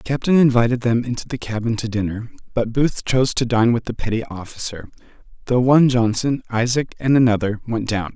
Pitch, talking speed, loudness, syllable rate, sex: 120 Hz, 190 wpm, -19 LUFS, 5.9 syllables/s, male